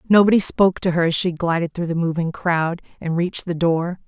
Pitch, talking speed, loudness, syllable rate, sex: 170 Hz, 220 wpm, -20 LUFS, 5.7 syllables/s, female